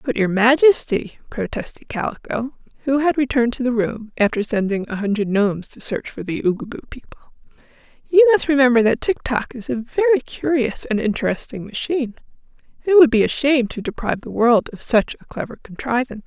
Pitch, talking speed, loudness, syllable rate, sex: 245 Hz, 180 wpm, -19 LUFS, 5.7 syllables/s, female